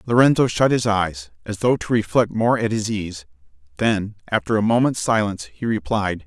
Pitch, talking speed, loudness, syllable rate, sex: 105 Hz, 180 wpm, -20 LUFS, 5.1 syllables/s, male